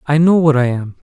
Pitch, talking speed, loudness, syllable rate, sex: 145 Hz, 270 wpm, -13 LUFS, 5.8 syllables/s, male